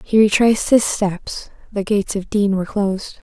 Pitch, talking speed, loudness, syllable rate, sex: 205 Hz, 180 wpm, -18 LUFS, 5.2 syllables/s, female